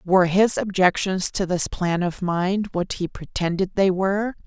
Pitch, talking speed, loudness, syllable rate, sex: 185 Hz, 175 wpm, -22 LUFS, 4.6 syllables/s, female